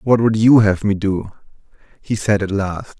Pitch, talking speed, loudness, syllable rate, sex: 105 Hz, 200 wpm, -16 LUFS, 4.5 syllables/s, male